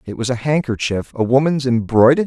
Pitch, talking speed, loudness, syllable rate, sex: 125 Hz, 130 wpm, -17 LUFS, 6.0 syllables/s, male